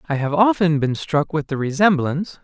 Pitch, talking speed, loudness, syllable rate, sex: 160 Hz, 195 wpm, -19 LUFS, 5.3 syllables/s, male